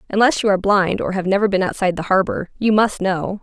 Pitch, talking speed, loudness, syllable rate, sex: 195 Hz, 245 wpm, -18 LUFS, 6.3 syllables/s, female